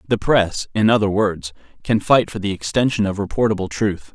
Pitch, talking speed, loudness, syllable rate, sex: 105 Hz, 190 wpm, -19 LUFS, 5.3 syllables/s, male